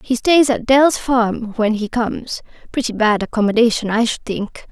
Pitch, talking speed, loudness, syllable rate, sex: 230 Hz, 165 wpm, -17 LUFS, 4.7 syllables/s, female